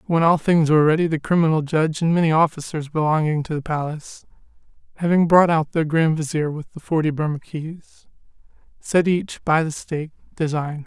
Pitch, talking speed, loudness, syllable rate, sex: 155 Hz, 180 wpm, -20 LUFS, 5.9 syllables/s, male